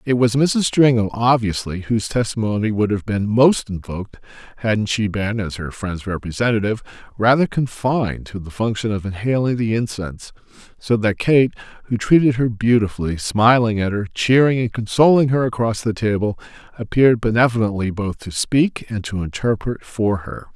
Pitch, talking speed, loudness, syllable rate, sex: 110 Hz, 160 wpm, -19 LUFS, 5.2 syllables/s, male